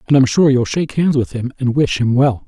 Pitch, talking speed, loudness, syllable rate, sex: 130 Hz, 290 wpm, -15 LUFS, 5.8 syllables/s, male